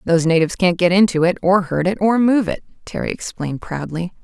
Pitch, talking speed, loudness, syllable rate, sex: 180 Hz, 210 wpm, -18 LUFS, 6.0 syllables/s, female